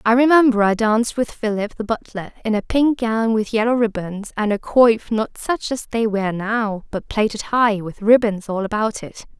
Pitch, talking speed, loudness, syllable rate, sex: 220 Hz, 205 wpm, -19 LUFS, 4.7 syllables/s, female